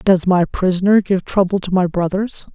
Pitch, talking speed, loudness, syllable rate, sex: 185 Hz, 190 wpm, -16 LUFS, 4.9 syllables/s, female